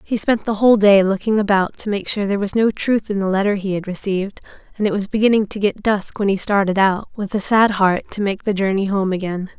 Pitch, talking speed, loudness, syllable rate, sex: 200 Hz, 255 wpm, -18 LUFS, 5.9 syllables/s, female